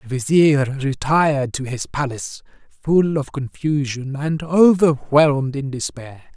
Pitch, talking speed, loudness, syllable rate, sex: 140 Hz, 125 wpm, -19 LUFS, 4.1 syllables/s, male